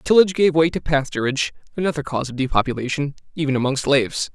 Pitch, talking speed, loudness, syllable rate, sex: 145 Hz, 165 wpm, -20 LUFS, 7.1 syllables/s, male